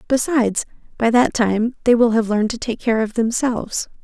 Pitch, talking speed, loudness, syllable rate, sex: 230 Hz, 195 wpm, -18 LUFS, 5.4 syllables/s, female